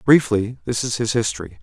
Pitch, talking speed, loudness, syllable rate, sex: 115 Hz, 185 wpm, -20 LUFS, 5.6 syllables/s, male